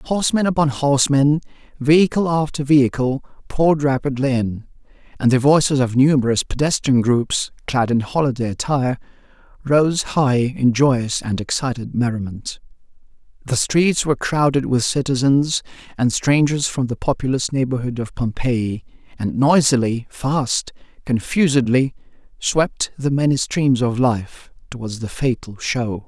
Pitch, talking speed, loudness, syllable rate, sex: 135 Hz, 120 wpm, -19 LUFS, 4.6 syllables/s, male